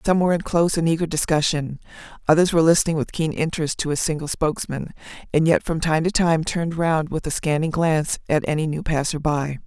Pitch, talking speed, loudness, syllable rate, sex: 160 Hz, 210 wpm, -21 LUFS, 6.2 syllables/s, female